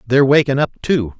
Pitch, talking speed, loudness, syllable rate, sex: 130 Hz, 200 wpm, -15 LUFS, 5.8 syllables/s, male